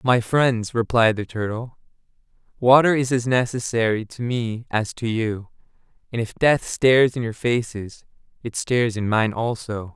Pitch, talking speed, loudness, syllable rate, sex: 115 Hz, 155 wpm, -21 LUFS, 4.5 syllables/s, male